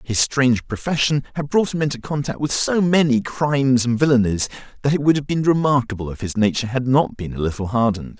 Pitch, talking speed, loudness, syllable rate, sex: 130 Hz, 210 wpm, -19 LUFS, 6.1 syllables/s, male